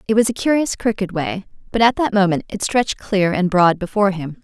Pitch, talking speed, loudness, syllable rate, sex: 200 Hz, 230 wpm, -18 LUFS, 5.8 syllables/s, female